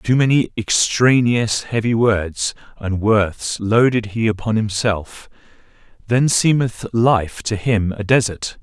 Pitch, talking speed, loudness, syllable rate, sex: 110 Hz, 120 wpm, -17 LUFS, 3.7 syllables/s, male